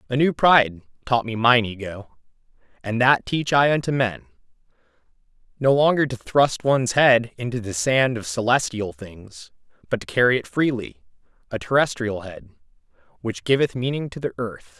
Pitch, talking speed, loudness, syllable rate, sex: 120 Hz, 160 wpm, -21 LUFS, 5.0 syllables/s, male